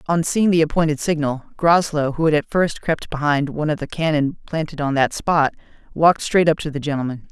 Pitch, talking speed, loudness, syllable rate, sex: 155 Hz, 215 wpm, -19 LUFS, 5.7 syllables/s, male